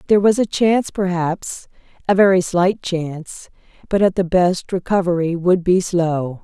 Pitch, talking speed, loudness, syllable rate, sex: 180 Hz, 160 wpm, -18 LUFS, 4.6 syllables/s, female